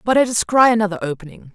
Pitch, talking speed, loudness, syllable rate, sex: 205 Hz, 195 wpm, -17 LUFS, 7.0 syllables/s, female